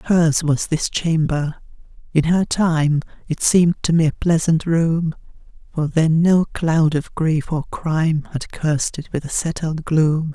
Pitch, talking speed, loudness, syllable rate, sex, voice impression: 160 Hz, 170 wpm, -19 LUFS, 4.1 syllables/s, female, gender-neutral, adult-like, thin, relaxed, weak, slightly dark, soft, muffled, calm, slightly friendly, reassuring, unique, kind, modest